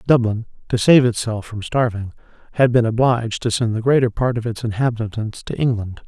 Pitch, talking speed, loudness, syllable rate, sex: 115 Hz, 190 wpm, -19 LUFS, 5.5 syllables/s, male